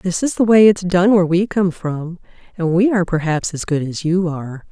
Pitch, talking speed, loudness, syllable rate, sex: 180 Hz, 240 wpm, -16 LUFS, 5.4 syllables/s, female